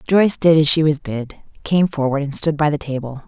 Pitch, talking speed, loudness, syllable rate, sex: 150 Hz, 240 wpm, -17 LUFS, 5.5 syllables/s, female